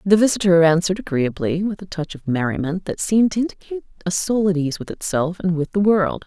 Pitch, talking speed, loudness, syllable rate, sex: 180 Hz, 220 wpm, -20 LUFS, 6.0 syllables/s, female